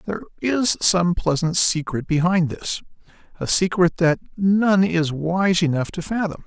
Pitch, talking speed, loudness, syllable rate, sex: 170 Hz, 150 wpm, -20 LUFS, 4.3 syllables/s, male